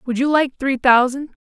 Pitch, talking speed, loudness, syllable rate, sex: 265 Hz, 210 wpm, -17 LUFS, 5.0 syllables/s, female